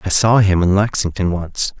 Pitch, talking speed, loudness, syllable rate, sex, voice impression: 95 Hz, 200 wpm, -16 LUFS, 4.9 syllables/s, male, adult-like, thick, soft, clear, fluent, cool, intellectual, sincere, calm, slightly wild, lively, kind